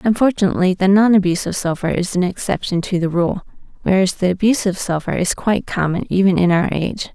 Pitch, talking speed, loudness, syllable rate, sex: 185 Hz, 200 wpm, -17 LUFS, 6.4 syllables/s, female